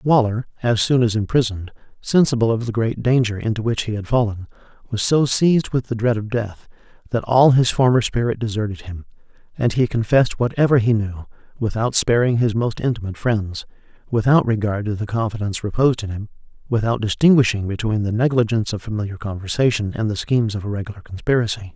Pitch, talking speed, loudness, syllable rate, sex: 115 Hz, 180 wpm, -19 LUFS, 6.1 syllables/s, male